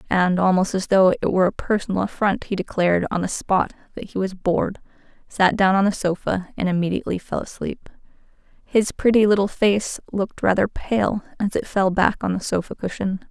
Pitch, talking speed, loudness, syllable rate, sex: 190 Hz, 190 wpm, -21 LUFS, 5.5 syllables/s, female